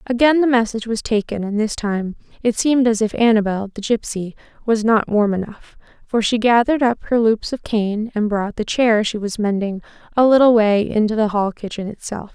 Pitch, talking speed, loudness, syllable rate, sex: 220 Hz, 205 wpm, -18 LUFS, 5.3 syllables/s, female